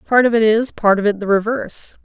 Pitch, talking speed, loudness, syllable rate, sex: 220 Hz, 265 wpm, -16 LUFS, 5.9 syllables/s, female